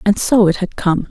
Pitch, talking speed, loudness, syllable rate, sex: 195 Hz, 270 wpm, -15 LUFS, 5.0 syllables/s, female